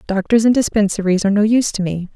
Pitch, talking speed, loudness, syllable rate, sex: 205 Hz, 225 wpm, -16 LUFS, 7.1 syllables/s, female